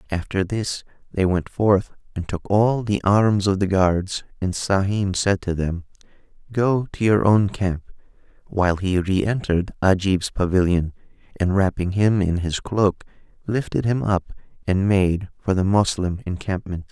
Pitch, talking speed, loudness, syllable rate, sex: 95 Hz, 155 wpm, -21 LUFS, 4.4 syllables/s, male